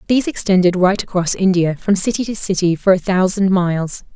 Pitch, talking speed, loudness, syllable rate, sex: 190 Hz, 190 wpm, -16 LUFS, 5.7 syllables/s, female